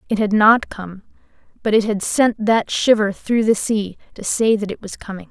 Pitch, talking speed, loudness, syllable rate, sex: 210 Hz, 215 wpm, -17 LUFS, 4.8 syllables/s, female